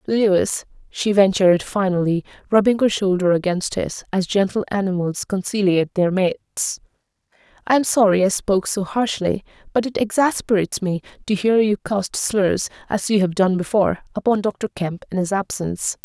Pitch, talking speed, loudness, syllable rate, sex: 195 Hz, 155 wpm, -20 LUFS, 5.1 syllables/s, female